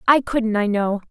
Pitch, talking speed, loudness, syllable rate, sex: 225 Hz, 215 wpm, -20 LUFS, 4.4 syllables/s, female